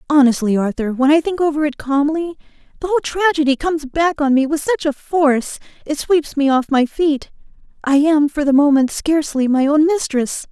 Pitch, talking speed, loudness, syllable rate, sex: 290 Hz, 195 wpm, -16 LUFS, 5.4 syllables/s, female